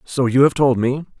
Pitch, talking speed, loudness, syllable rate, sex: 130 Hz, 250 wpm, -17 LUFS, 5.1 syllables/s, male